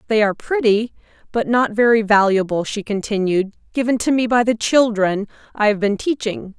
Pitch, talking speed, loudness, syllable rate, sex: 220 Hz, 165 wpm, -18 LUFS, 5.2 syllables/s, female